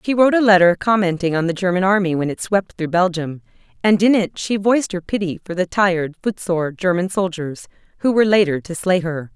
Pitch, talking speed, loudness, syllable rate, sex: 185 Hz, 200 wpm, -18 LUFS, 5.9 syllables/s, female